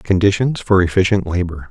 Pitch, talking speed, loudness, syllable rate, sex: 95 Hz, 140 wpm, -16 LUFS, 5.4 syllables/s, male